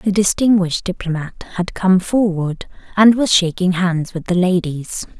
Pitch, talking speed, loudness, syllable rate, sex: 185 Hz, 150 wpm, -17 LUFS, 4.5 syllables/s, female